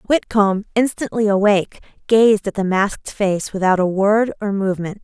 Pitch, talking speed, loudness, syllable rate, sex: 205 Hz, 155 wpm, -17 LUFS, 5.0 syllables/s, female